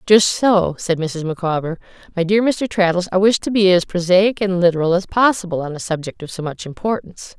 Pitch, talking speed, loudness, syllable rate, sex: 185 Hz, 210 wpm, -17 LUFS, 5.6 syllables/s, female